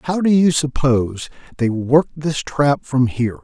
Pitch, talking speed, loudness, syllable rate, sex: 140 Hz, 175 wpm, -18 LUFS, 4.7 syllables/s, male